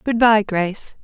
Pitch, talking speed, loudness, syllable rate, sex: 210 Hz, 175 wpm, -17 LUFS, 4.6 syllables/s, female